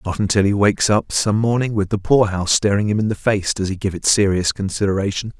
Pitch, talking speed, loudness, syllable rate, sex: 100 Hz, 235 wpm, -18 LUFS, 6.1 syllables/s, male